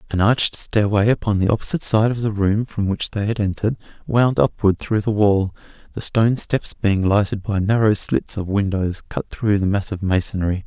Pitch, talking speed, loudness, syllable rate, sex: 105 Hz, 200 wpm, -20 LUFS, 5.4 syllables/s, male